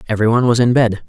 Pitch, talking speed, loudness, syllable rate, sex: 115 Hz, 220 wpm, -14 LUFS, 8.1 syllables/s, male